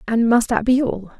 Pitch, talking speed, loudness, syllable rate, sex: 230 Hz, 250 wpm, -18 LUFS, 4.9 syllables/s, female